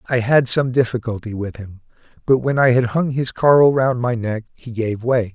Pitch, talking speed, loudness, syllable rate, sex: 120 Hz, 215 wpm, -18 LUFS, 4.9 syllables/s, male